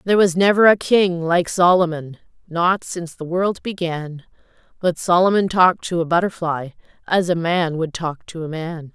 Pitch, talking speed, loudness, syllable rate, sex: 175 Hz, 175 wpm, -19 LUFS, 4.8 syllables/s, female